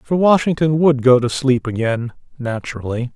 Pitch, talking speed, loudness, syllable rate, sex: 135 Hz, 150 wpm, -17 LUFS, 4.9 syllables/s, male